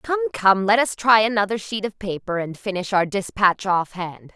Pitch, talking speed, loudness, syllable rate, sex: 195 Hz, 205 wpm, -21 LUFS, 4.8 syllables/s, female